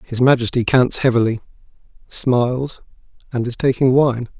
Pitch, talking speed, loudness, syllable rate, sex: 125 Hz, 125 wpm, -17 LUFS, 4.9 syllables/s, male